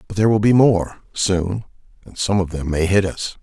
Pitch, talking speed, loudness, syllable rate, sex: 95 Hz, 225 wpm, -18 LUFS, 5.3 syllables/s, male